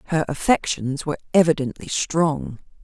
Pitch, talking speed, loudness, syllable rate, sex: 145 Hz, 105 wpm, -22 LUFS, 5.0 syllables/s, female